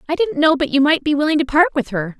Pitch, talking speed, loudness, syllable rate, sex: 295 Hz, 330 wpm, -16 LUFS, 6.8 syllables/s, female